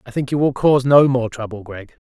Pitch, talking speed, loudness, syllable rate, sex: 125 Hz, 260 wpm, -16 LUFS, 5.9 syllables/s, male